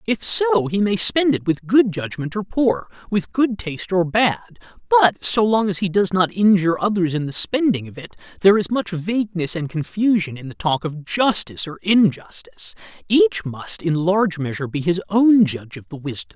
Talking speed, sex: 210 wpm, male